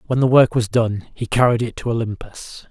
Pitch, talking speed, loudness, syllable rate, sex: 115 Hz, 220 wpm, -18 LUFS, 5.2 syllables/s, male